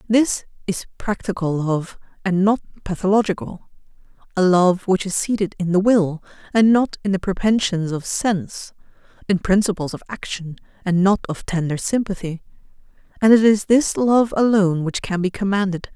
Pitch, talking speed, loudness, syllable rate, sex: 195 Hz, 155 wpm, -19 LUFS, 5.0 syllables/s, female